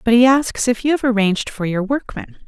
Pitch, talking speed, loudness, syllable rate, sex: 230 Hz, 240 wpm, -17 LUFS, 5.6 syllables/s, female